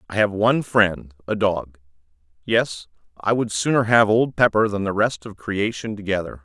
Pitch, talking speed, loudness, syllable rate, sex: 105 Hz, 175 wpm, -20 LUFS, 4.8 syllables/s, male